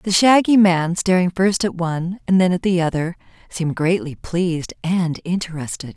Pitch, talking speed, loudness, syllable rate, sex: 175 Hz, 170 wpm, -19 LUFS, 4.9 syllables/s, female